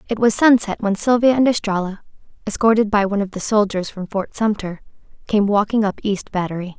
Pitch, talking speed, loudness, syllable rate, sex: 205 Hz, 185 wpm, -18 LUFS, 5.8 syllables/s, female